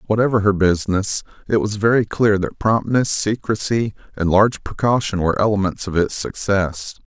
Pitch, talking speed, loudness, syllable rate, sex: 100 Hz, 155 wpm, -19 LUFS, 5.2 syllables/s, male